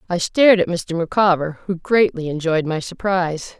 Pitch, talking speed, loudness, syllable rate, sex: 175 Hz, 165 wpm, -18 LUFS, 5.0 syllables/s, female